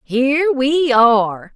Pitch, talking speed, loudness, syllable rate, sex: 260 Hz, 115 wpm, -15 LUFS, 3.5 syllables/s, female